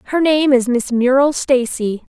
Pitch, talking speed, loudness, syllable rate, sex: 260 Hz, 165 wpm, -15 LUFS, 4.4 syllables/s, female